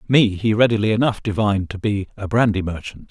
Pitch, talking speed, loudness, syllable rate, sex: 105 Hz, 195 wpm, -19 LUFS, 5.9 syllables/s, male